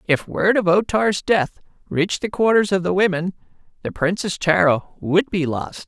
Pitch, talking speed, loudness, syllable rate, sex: 180 Hz, 185 wpm, -19 LUFS, 4.7 syllables/s, male